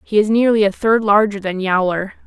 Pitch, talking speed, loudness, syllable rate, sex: 205 Hz, 210 wpm, -16 LUFS, 5.3 syllables/s, female